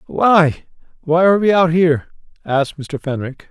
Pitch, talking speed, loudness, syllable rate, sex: 165 Hz, 135 wpm, -16 LUFS, 5.0 syllables/s, male